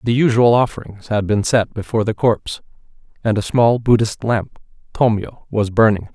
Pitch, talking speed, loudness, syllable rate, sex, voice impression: 110 Hz, 145 wpm, -17 LUFS, 5.2 syllables/s, male, very masculine, very adult-like, slightly old, very thick, slightly tensed, powerful, slightly dark, hard, very clear, very fluent, very cool, very intellectual, sincere, calm, very mature, very friendly, very reassuring, unique, slightly elegant, very wild, very kind, slightly modest